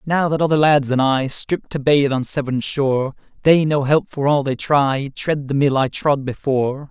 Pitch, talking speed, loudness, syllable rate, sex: 140 Hz, 215 wpm, -18 LUFS, 4.7 syllables/s, male